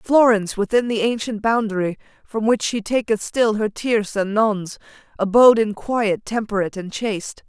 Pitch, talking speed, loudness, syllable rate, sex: 215 Hz, 160 wpm, -20 LUFS, 5.2 syllables/s, female